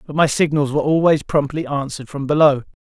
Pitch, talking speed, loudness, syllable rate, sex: 145 Hz, 190 wpm, -18 LUFS, 6.3 syllables/s, male